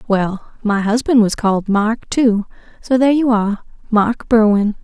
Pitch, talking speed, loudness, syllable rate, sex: 220 Hz, 150 wpm, -16 LUFS, 4.8 syllables/s, female